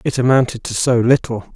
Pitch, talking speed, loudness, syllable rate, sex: 125 Hz, 195 wpm, -16 LUFS, 5.6 syllables/s, male